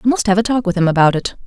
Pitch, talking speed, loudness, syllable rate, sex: 205 Hz, 370 wpm, -15 LUFS, 7.8 syllables/s, female